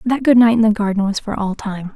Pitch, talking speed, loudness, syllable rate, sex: 215 Hz, 305 wpm, -16 LUFS, 6.0 syllables/s, female